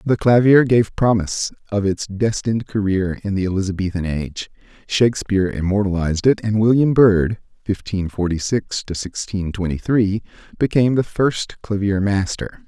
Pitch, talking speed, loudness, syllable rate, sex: 100 Hz, 140 wpm, -19 LUFS, 4.3 syllables/s, male